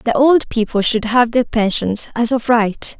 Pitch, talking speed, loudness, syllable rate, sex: 230 Hz, 200 wpm, -15 LUFS, 4.2 syllables/s, female